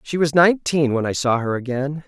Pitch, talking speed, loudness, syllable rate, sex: 145 Hz, 230 wpm, -19 LUFS, 5.6 syllables/s, male